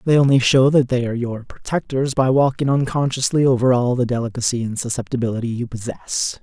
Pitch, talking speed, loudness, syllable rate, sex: 125 Hz, 175 wpm, -19 LUFS, 5.9 syllables/s, male